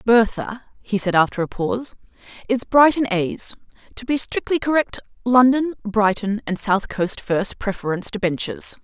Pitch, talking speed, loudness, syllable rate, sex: 220 Hz, 135 wpm, -20 LUFS, 4.9 syllables/s, female